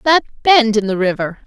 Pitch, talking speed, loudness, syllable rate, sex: 235 Hz, 205 wpm, -15 LUFS, 5.2 syllables/s, female